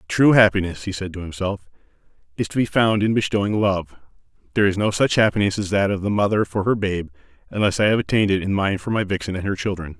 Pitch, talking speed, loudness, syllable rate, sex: 100 Hz, 235 wpm, -20 LUFS, 6.5 syllables/s, male